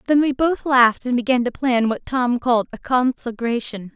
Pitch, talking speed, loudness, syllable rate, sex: 250 Hz, 195 wpm, -19 LUFS, 5.1 syllables/s, female